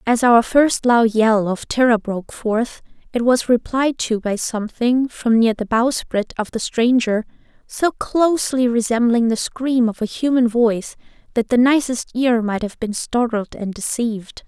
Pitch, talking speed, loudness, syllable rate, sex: 235 Hz, 170 wpm, -18 LUFS, 4.5 syllables/s, female